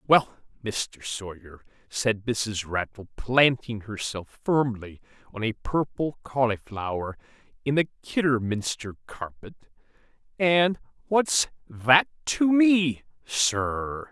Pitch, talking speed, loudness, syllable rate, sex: 125 Hz, 100 wpm, -25 LUFS, 3.4 syllables/s, male